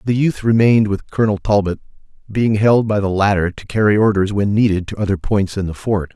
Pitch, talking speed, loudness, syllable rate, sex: 105 Hz, 215 wpm, -16 LUFS, 5.8 syllables/s, male